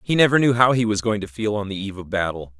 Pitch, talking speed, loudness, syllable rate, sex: 105 Hz, 325 wpm, -20 LUFS, 6.9 syllables/s, male